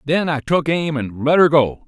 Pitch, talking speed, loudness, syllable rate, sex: 145 Hz, 255 wpm, -17 LUFS, 4.6 syllables/s, male